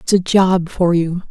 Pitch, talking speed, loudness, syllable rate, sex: 180 Hz, 230 wpm, -15 LUFS, 4.1 syllables/s, female